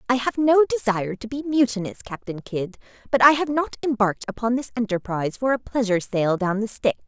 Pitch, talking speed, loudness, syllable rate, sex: 230 Hz, 205 wpm, -22 LUFS, 6.1 syllables/s, female